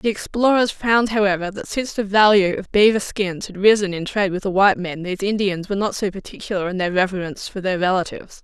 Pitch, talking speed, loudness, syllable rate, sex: 195 Hz, 220 wpm, -19 LUFS, 6.3 syllables/s, female